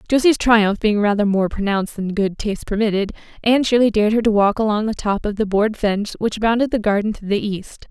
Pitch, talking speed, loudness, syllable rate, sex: 210 Hz, 230 wpm, -18 LUFS, 6.0 syllables/s, female